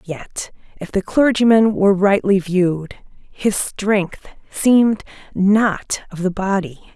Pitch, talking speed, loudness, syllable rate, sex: 195 Hz, 120 wpm, -17 LUFS, 3.9 syllables/s, female